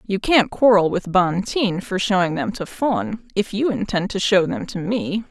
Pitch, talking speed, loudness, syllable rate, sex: 195 Hz, 205 wpm, -20 LUFS, 4.3 syllables/s, female